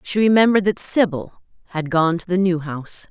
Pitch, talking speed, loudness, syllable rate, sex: 180 Hz, 195 wpm, -18 LUFS, 5.6 syllables/s, female